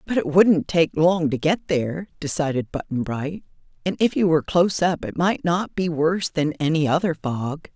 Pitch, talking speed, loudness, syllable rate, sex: 160 Hz, 200 wpm, -22 LUFS, 5.0 syllables/s, female